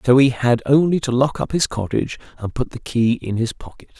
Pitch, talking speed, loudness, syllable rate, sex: 125 Hz, 240 wpm, -19 LUFS, 5.6 syllables/s, male